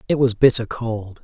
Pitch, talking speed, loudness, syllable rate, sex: 115 Hz, 195 wpm, -19 LUFS, 4.8 syllables/s, male